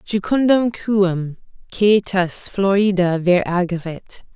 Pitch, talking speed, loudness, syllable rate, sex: 190 Hz, 85 wpm, -18 LUFS, 3.7 syllables/s, female